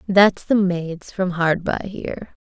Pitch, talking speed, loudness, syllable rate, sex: 185 Hz, 170 wpm, -20 LUFS, 3.7 syllables/s, female